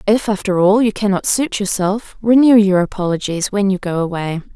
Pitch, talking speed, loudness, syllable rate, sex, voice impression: 200 Hz, 185 wpm, -16 LUFS, 5.2 syllables/s, female, feminine, adult-like, slightly tensed, bright, soft, clear, fluent, slightly refreshing, calm, friendly, reassuring, elegant, slightly lively, kind